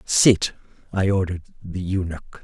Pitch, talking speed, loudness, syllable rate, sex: 90 Hz, 125 wpm, -22 LUFS, 4.5 syllables/s, male